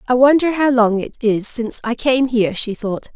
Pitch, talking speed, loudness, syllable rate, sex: 240 Hz, 230 wpm, -17 LUFS, 5.2 syllables/s, female